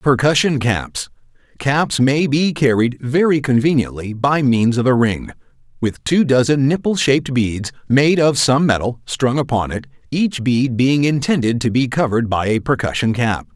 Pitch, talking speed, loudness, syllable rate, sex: 130 Hz, 160 wpm, -17 LUFS, 4.6 syllables/s, male